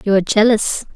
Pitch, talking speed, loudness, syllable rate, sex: 210 Hz, 190 wpm, -15 LUFS, 6.3 syllables/s, female